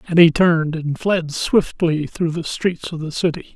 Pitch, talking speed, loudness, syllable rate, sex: 165 Hz, 200 wpm, -19 LUFS, 4.6 syllables/s, male